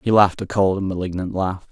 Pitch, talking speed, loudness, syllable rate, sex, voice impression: 95 Hz, 245 wpm, -20 LUFS, 6.3 syllables/s, male, masculine, adult-like, slightly refreshing, sincere, slightly unique